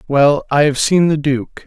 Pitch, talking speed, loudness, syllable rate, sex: 145 Hz, 215 wpm, -14 LUFS, 4.1 syllables/s, male